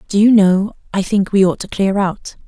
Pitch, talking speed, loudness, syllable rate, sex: 195 Hz, 240 wpm, -15 LUFS, 4.8 syllables/s, female